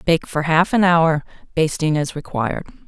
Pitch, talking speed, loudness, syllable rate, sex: 160 Hz, 165 wpm, -19 LUFS, 4.8 syllables/s, female